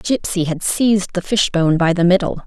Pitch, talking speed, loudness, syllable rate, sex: 185 Hz, 195 wpm, -16 LUFS, 5.7 syllables/s, female